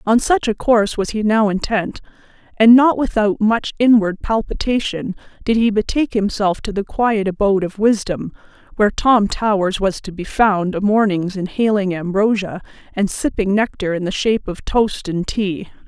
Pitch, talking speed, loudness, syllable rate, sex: 205 Hz, 170 wpm, -17 LUFS, 4.9 syllables/s, female